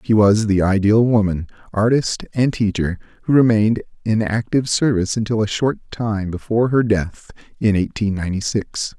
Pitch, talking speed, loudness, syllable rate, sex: 105 Hz, 160 wpm, -18 LUFS, 5.2 syllables/s, male